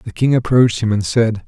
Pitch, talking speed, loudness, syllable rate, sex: 110 Hz, 245 wpm, -15 LUFS, 5.6 syllables/s, male